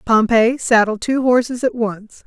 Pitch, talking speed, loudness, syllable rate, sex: 235 Hz, 160 wpm, -16 LUFS, 4.2 syllables/s, female